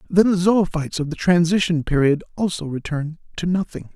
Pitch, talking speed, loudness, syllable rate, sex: 170 Hz, 165 wpm, -20 LUFS, 5.5 syllables/s, male